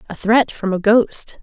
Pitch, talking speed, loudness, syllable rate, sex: 210 Hz, 210 wpm, -16 LUFS, 4.0 syllables/s, female